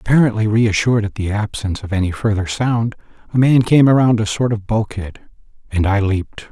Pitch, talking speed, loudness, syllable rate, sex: 110 Hz, 175 wpm, -17 LUFS, 5.7 syllables/s, male